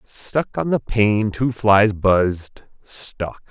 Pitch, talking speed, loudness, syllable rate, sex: 110 Hz, 135 wpm, -19 LUFS, 2.8 syllables/s, male